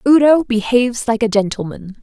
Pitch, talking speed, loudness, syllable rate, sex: 235 Hz, 150 wpm, -15 LUFS, 5.4 syllables/s, female